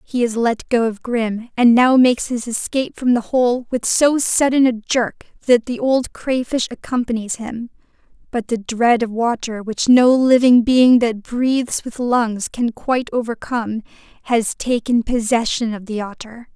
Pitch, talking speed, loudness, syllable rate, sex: 240 Hz, 170 wpm, -17 LUFS, 4.4 syllables/s, female